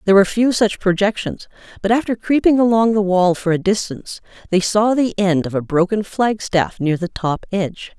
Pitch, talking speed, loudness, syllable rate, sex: 200 Hz, 195 wpm, -17 LUFS, 5.3 syllables/s, female